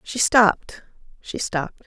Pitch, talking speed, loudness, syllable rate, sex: 205 Hz, 130 wpm, -20 LUFS, 4.5 syllables/s, female